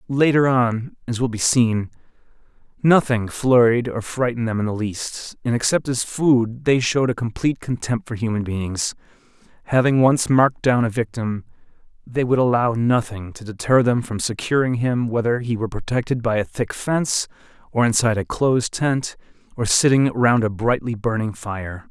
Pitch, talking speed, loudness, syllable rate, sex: 120 Hz, 170 wpm, -20 LUFS, 5.0 syllables/s, male